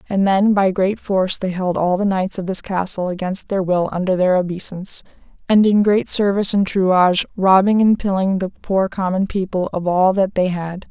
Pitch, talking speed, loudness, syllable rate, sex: 190 Hz, 205 wpm, -18 LUFS, 5.1 syllables/s, female